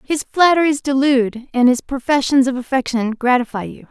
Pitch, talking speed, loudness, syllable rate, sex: 260 Hz, 155 wpm, -17 LUFS, 5.4 syllables/s, female